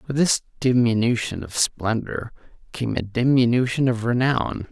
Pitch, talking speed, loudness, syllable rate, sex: 120 Hz, 125 wpm, -22 LUFS, 4.5 syllables/s, male